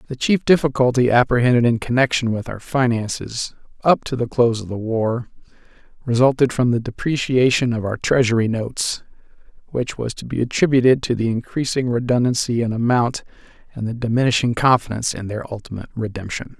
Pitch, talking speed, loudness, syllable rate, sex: 120 Hz, 155 wpm, -19 LUFS, 5.8 syllables/s, male